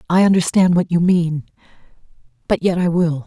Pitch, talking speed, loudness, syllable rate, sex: 170 Hz, 165 wpm, -17 LUFS, 5.3 syllables/s, female